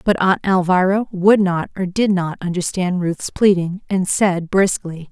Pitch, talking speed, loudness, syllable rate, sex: 185 Hz, 165 wpm, -18 LUFS, 4.2 syllables/s, female